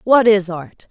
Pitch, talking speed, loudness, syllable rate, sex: 200 Hz, 200 wpm, -14 LUFS, 3.7 syllables/s, female